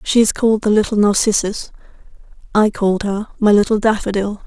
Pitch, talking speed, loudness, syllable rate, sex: 210 Hz, 160 wpm, -16 LUFS, 5.9 syllables/s, female